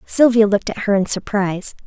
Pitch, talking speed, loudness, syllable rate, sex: 205 Hz, 195 wpm, -17 LUFS, 6.0 syllables/s, female